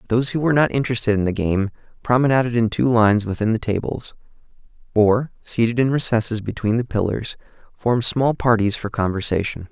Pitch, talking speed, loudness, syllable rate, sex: 115 Hz, 165 wpm, -20 LUFS, 6.0 syllables/s, male